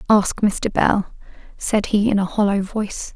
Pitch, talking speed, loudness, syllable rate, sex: 205 Hz, 170 wpm, -20 LUFS, 4.4 syllables/s, female